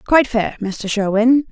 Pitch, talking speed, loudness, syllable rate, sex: 230 Hz, 160 wpm, -17 LUFS, 4.8 syllables/s, female